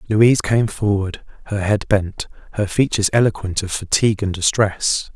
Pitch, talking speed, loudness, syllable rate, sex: 105 Hz, 150 wpm, -18 LUFS, 5.1 syllables/s, male